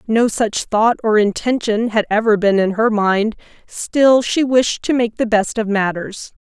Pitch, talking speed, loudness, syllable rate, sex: 220 Hz, 185 wpm, -16 LUFS, 4.1 syllables/s, female